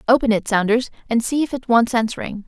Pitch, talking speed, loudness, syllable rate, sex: 235 Hz, 220 wpm, -19 LUFS, 6.1 syllables/s, female